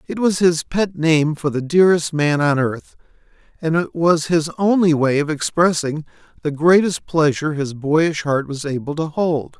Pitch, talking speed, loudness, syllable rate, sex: 160 Hz, 180 wpm, -18 LUFS, 4.6 syllables/s, male